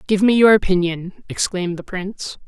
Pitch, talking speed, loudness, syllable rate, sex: 190 Hz, 170 wpm, -18 LUFS, 5.4 syllables/s, female